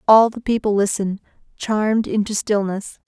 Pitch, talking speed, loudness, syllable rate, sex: 210 Hz, 135 wpm, -19 LUFS, 5.2 syllables/s, female